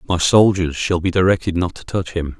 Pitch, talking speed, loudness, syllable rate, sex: 90 Hz, 225 wpm, -17 LUFS, 5.4 syllables/s, male